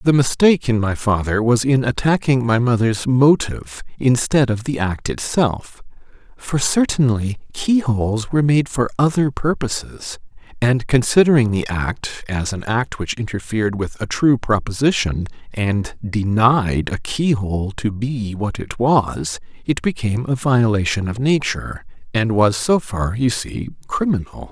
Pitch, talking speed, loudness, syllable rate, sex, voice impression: 115 Hz, 145 wpm, -18 LUFS, 4.4 syllables/s, male, masculine, adult-like, slightly thick, fluent, cool, sincere, slightly calm